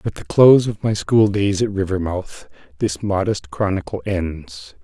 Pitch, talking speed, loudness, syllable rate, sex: 100 Hz, 160 wpm, -19 LUFS, 4.4 syllables/s, male